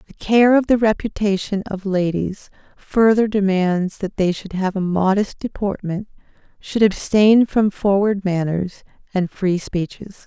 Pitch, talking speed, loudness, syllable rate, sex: 200 Hz, 140 wpm, -19 LUFS, 4.2 syllables/s, female